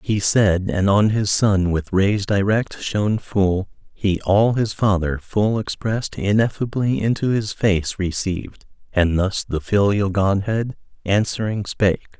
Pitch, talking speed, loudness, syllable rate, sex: 100 Hz, 145 wpm, -20 LUFS, 3.8 syllables/s, male